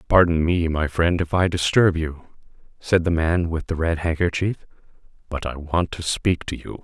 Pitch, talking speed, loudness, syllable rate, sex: 85 Hz, 195 wpm, -22 LUFS, 4.6 syllables/s, male